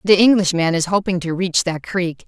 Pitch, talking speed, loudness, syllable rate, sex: 180 Hz, 210 wpm, -17 LUFS, 5.1 syllables/s, female